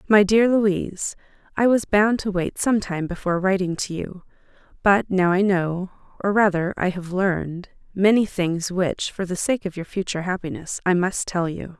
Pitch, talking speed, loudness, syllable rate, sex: 190 Hz, 185 wpm, -22 LUFS, 4.8 syllables/s, female